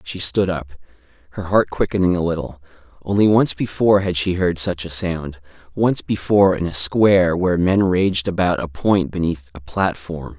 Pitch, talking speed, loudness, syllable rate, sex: 90 Hz, 175 wpm, -18 LUFS, 4.9 syllables/s, male